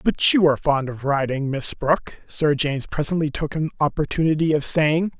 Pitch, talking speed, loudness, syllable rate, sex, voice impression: 150 Hz, 185 wpm, -21 LUFS, 5.6 syllables/s, male, masculine, very adult-like, slightly old, thick, slightly relaxed, powerful, slightly dark, very hard, slightly muffled, fluent, raspy, cool, very intellectual, sincere, calm, very mature, friendly, reassuring, very unique, very wild, slightly sweet, slightly lively, strict, intense